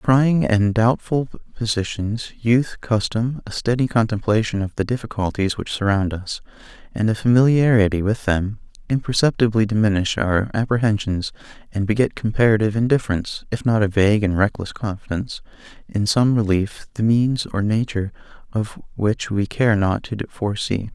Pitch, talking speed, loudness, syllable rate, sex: 110 Hz, 145 wpm, -20 LUFS, 5.2 syllables/s, male